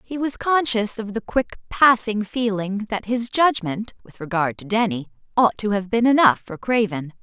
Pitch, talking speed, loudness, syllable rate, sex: 215 Hz, 185 wpm, -21 LUFS, 4.6 syllables/s, female